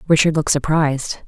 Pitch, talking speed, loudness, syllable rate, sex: 150 Hz, 140 wpm, -17 LUFS, 6.3 syllables/s, female